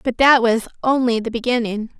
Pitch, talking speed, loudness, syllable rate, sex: 235 Hz, 180 wpm, -18 LUFS, 5.5 syllables/s, female